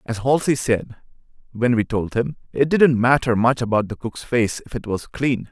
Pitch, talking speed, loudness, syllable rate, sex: 120 Hz, 205 wpm, -20 LUFS, 4.6 syllables/s, male